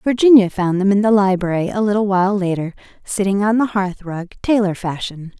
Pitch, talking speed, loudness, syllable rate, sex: 195 Hz, 190 wpm, -17 LUFS, 5.6 syllables/s, female